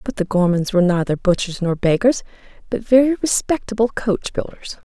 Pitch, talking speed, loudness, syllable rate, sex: 205 Hz, 160 wpm, -18 LUFS, 5.4 syllables/s, female